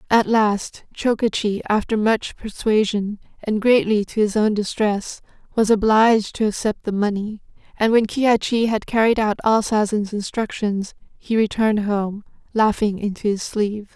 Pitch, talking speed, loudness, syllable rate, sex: 215 Hz, 145 wpm, -20 LUFS, 4.5 syllables/s, female